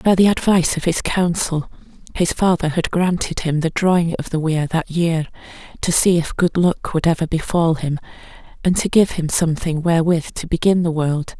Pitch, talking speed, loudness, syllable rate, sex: 165 Hz, 195 wpm, -18 LUFS, 5.2 syllables/s, female